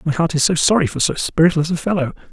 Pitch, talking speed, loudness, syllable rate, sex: 160 Hz, 260 wpm, -17 LUFS, 6.6 syllables/s, male